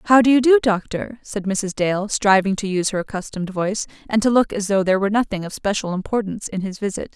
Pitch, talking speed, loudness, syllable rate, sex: 205 Hz, 235 wpm, -20 LUFS, 6.5 syllables/s, female